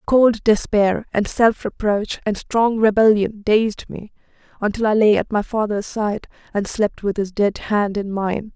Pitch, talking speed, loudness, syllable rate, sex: 210 Hz, 175 wpm, -19 LUFS, 4.1 syllables/s, female